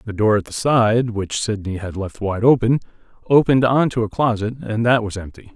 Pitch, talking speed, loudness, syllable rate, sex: 110 Hz, 215 wpm, -19 LUFS, 5.4 syllables/s, male